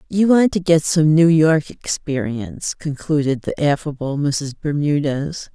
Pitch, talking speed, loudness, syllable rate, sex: 150 Hz, 140 wpm, -18 LUFS, 4.2 syllables/s, female